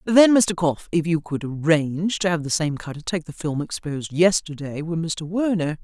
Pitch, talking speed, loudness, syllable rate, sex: 165 Hz, 205 wpm, -22 LUFS, 5.0 syllables/s, female